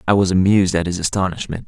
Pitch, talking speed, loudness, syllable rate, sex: 95 Hz, 215 wpm, -18 LUFS, 7.2 syllables/s, male